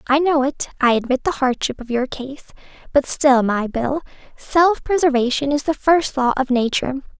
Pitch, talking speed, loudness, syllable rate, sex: 275 Hz, 185 wpm, -18 LUFS, 5.0 syllables/s, female